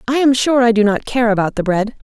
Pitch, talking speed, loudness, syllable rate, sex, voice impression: 230 Hz, 285 wpm, -15 LUFS, 5.9 syllables/s, female, feminine, middle-aged, tensed, powerful, clear, fluent, slightly raspy, intellectual, calm, friendly, reassuring, elegant, lively, slightly kind